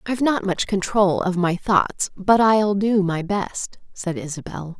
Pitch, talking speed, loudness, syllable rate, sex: 195 Hz, 175 wpm, -21 LUFS, 4.0 syllables/s, female